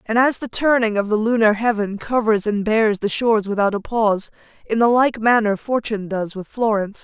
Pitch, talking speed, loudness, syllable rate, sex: 220 Hz, 205 wpm, -19 LUFS, 5.6 syllables/s, female